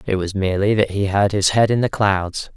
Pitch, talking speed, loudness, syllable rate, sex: 100 Hz, 260 wpm, -18 LUFS, 5.4 syllables/s, male